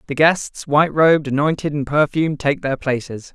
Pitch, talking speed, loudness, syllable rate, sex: 145 Hz, 180 wpm, -18 LUFS, 5.4 syllables/s, male